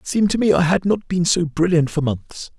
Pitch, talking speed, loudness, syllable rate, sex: 170 Hz, 280 wpm, -18 LUFS, 5.6 syllables/s, male